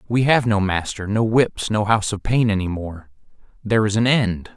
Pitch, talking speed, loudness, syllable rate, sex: 105 Hz, 210 wpm, -19 LUFS, 5.2 syllables/s, male